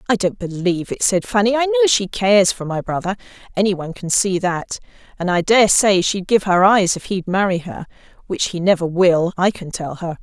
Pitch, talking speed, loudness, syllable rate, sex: 195 Hz, 215 wpm, -17 LUFS, 5.4 syllables/s, female